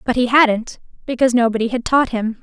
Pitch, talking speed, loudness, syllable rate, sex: 240 Hz, 200 wpm, -16 LUFS, 5.9 syllables/s, female